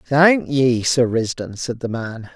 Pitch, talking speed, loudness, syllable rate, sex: 130 Hz, 180 wpm, -18 LUFS, 3.7 syllables/s, male